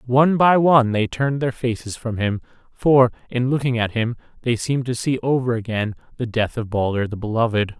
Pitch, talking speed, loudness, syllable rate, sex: 120 Hz, 200 wpm, -20 LUFS, 5.6 syllables/s, male